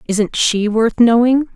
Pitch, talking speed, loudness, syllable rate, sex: 230 Hz, 155 wpm, -14 LUFS, 3.6 syllables/s, female